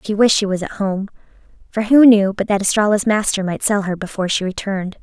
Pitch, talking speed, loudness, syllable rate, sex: 200 Hz, 225 wpm, -17 LUFS, 6.1 syllables/s, female